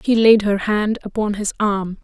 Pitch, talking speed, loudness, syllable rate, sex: 210 Hz, 205 wpm, -18 LUFS, 4.5 syllables/s, female